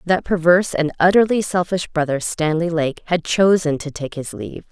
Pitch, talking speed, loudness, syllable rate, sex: 165 Hz, 180 wpm, -18 LUFS, 5.2 syllables/s, female